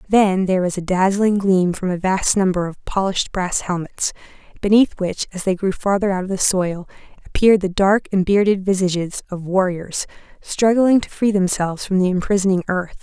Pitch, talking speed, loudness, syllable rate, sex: 190 Hz, 185 wpm, -18 LUFS, 5.2 syllables/s, female